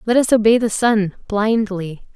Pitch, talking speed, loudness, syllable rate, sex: 215 Hz, 165 wpm, -17 LUFS, 4.3 syllables/s, female